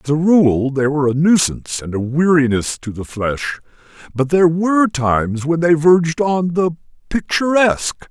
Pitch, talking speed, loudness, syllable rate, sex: 155 Hz, 170 wpm, -16 LUFS, 4.9 syllables/s, male